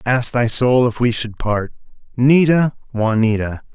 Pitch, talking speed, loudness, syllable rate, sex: 120 Hz, 145 wpm, -17 LUFS, 4.4 syllables/s, male